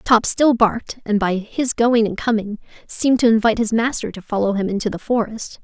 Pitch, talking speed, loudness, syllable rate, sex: 220 Hz, 215 wpm, -19 LUFS, 5.5 syllables/s, female